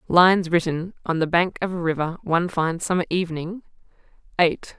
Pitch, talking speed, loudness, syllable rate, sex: 170 Hz, 165 wpm, -22 LUFS, 5.5 syllables/s, female